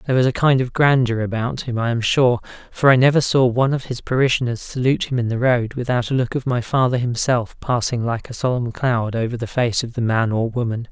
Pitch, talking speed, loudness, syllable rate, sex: 120 Hz, 240 wpm, -19 LUFS, 5.8 syllables/s, male